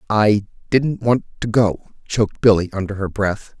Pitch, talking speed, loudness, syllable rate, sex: 105 Hz, 135 wpm, -19 LUFS, 4.8 syllables/s, male